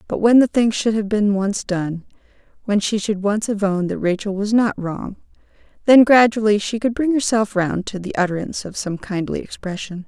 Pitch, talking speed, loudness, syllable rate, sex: 205 Hz, 205 wpm, -19 LUFS, 5.2 syllables/s, female